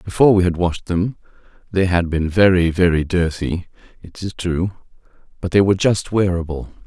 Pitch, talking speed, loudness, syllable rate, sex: 90 Hz, 165 wpm, -18 LUFS, 5.3 syllables/s, male